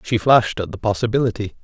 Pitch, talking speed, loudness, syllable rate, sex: 110 Hz, 185 wpm, -19 LUFS, 6.7 syllables/s, male